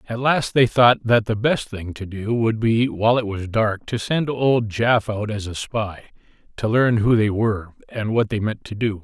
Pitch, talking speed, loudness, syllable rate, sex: 110 Hz, 245 wpm, -20 LUFS, 4.8 syllables/s, male